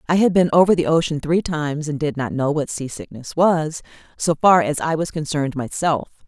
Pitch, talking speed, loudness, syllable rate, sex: 155 Hz, 210 wpm, -19 LUFS, 5.4 syllables/s, female